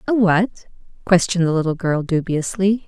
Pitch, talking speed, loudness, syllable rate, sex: 180 Hz, 125 wpm, -19 LUFS, 5.1 syllables/s, female